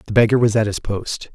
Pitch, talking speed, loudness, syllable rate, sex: 110 Hz, 265 wpm, -18 LUFS, 5.9 syllables/s, male